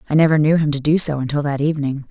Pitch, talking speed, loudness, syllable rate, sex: 150 Hz, 285 wpm, -17 LUFS, 7.4 syllables/s, female